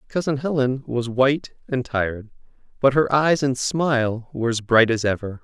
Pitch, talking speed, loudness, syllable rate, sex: 130 Hz, 175 wpm, -21 LUFS, 5.0 syllables/s, male